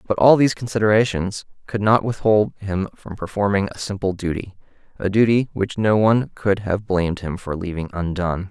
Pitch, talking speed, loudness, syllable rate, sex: 100 Hz, 170 wpm, -20 LUFS, 5.5 syllables/s, male